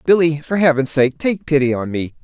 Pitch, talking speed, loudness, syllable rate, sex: 150 Hz, 215 wpm, -17 LUFS, 5.4 syllables/s, male